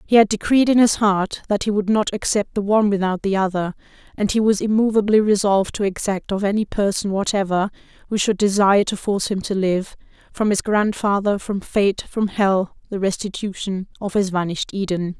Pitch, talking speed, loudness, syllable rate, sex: 200 Hz, 180 wpm, -20 LUFS, 5.5 syllables/s, female